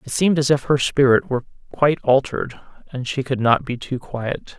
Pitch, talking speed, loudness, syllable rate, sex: 135 Hz, 210 wpm, -20 LUFS, 5.6 syllables/s, male